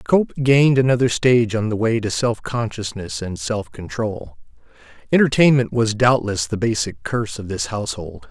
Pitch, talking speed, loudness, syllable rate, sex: 110 Hz, 160 wpm, -19 LUFS, 4.9 syllables/s, male